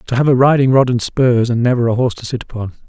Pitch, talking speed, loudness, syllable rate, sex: 125 Hz, 290 wpm, -14 LUFS, 6.8 syllables/s, male